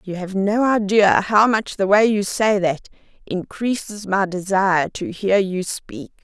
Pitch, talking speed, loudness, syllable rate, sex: 195 Hz, 175 wpm, -19 LUFS, 4.1 syllables/s, female